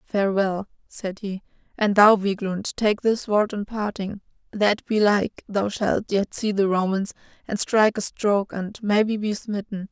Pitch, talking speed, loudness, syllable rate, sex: 205 Hz, 165 wpm, -23 LUFS, 4.5 syllables/s, female